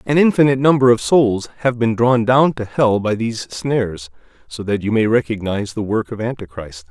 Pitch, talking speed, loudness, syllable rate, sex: 115 Hz, 200 wpm, -17 LUFS, 5.3 syllables/s, male